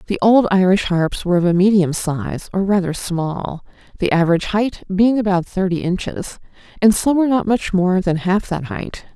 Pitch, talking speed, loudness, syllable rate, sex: 190 Hz, 190 wpm, -17 LUFS, 5.0 syllables/s, female